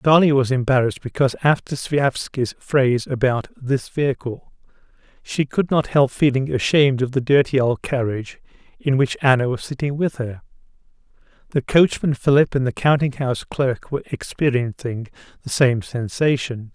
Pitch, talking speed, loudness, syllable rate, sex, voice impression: 130 Hz, 145 wpm, -20 LUFS, 5.1 syllables/s, male, very masculine, slightly old, slightly thick, sincere, slightly calm, slightly elegant, slightly kind